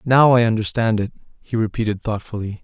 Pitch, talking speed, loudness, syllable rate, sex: 110 Hz, 160 wpm, -19 LUFS, 5.8 syllables/s, male